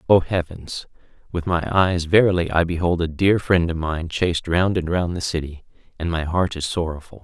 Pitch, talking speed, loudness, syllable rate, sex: 85 Hz, 200 wpm, -21 LUFS, 5.1 syllables/s, male